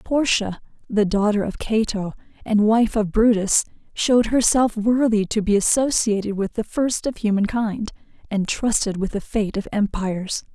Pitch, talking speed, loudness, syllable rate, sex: 215 Hz, 160 wpm, -21 LUFS, 4.6 syllables/s, female